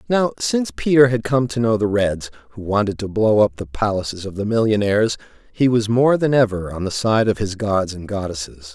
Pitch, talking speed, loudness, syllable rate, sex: 110 Hz, 220 wpm, -19 LUFS, 5.4 syllables/s, male